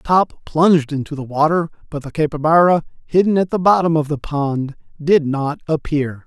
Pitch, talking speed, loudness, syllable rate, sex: 155 Hz, 170 wpm, -17 LUFS, 4.9 syllables/s, male